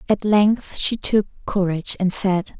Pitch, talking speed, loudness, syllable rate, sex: 195 Hz, 160 wpm, -19 LUFS, 4.1 syllables/s, female